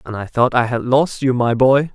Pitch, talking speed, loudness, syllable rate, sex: 125 Hz, 275 wpm, -16 LUFS, 4.9 syllables/s, male